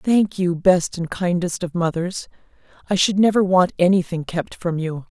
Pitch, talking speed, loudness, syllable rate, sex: 180 Hz, 175 wpm, -20 LUFS, 4.5 syllables/s, female